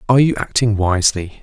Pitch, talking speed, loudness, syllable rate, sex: 110 Hz, 170 wpm, -16 LUFS, 6.4 syllables/s, male